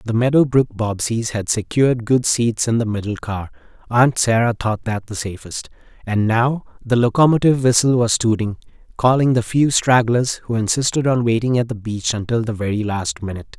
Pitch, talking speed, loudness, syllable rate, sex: 115 Hz, 170 wpm, -18 LUFS, 5.3 syllables/s, male